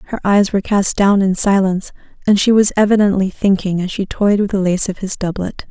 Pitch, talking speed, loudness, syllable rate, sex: 195 Hz, 220 wpm, -15 LUFS, 5.8 syllables/s, female